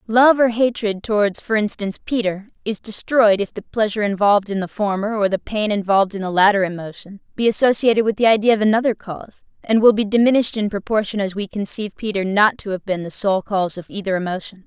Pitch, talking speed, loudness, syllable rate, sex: 205 Hz, 215 wpm, -19 LUFS, 6.2 syllables/s, female